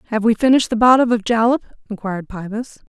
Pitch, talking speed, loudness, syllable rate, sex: 225 Hz, 185 wpm, -17 LUFS, 7.0 syllables/s, female